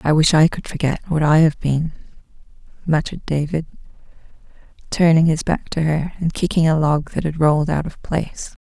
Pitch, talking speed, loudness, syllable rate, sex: 155 Hz, 180 wpm, -19 LUFS, 5.4 syllables/s, female